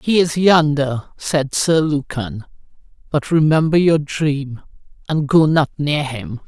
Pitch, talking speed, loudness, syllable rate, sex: 150 Hz, 140 wpm, -17 LUFS, 3.7 syllables/s, female